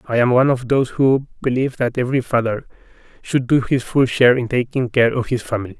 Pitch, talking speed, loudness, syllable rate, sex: 125 Hz, 240 wpm, -18 LUFS, 6.9 syllables/s, male